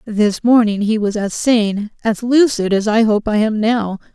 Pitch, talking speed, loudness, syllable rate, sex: 220 Hz, 205 wpm, -16 LUFS, 4.2 syllables/s, female